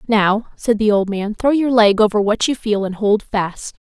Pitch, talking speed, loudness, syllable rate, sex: 215 Hz, 230 wpm, -17 LUFS, 4.5 syllables/s, female